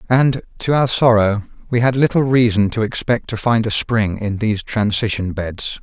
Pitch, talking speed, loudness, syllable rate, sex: 110 Hz, 185 wpm, -17 LUFS, 4.8 syllables/s, male